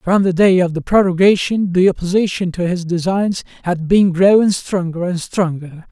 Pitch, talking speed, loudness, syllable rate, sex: 180 Hz, 170 wpm, -15 LUFS, 4.8 syllables/s, male